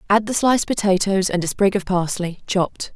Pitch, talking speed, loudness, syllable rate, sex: 195 Hz, 205 wpm, -20 LUFS, 5.6 syllables/s, female